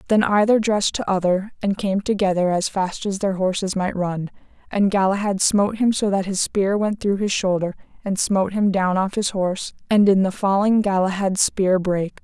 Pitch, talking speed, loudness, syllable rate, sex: 195 Hz, 200 wpm, -20 LUFS, 5.2 syllables/s, female